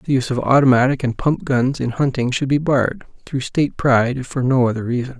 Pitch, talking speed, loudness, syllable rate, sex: 130 Hz, 220 wpm, -18 LUFS, 6.0 syllables/s, male